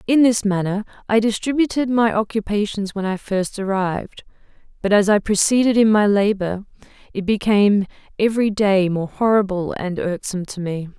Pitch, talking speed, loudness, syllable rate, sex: 205 Hz, 155 wpm, -19 LUFS, 5.2 syllables/s, female